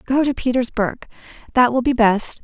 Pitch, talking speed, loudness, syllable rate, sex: 245 Hz, 175 wpm, -18 LUFS, 4.9 syllables/s, female